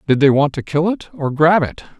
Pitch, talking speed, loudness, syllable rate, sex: 155 Hz, 270 wpm, -16 LUFS, 5.5 syllables/s, male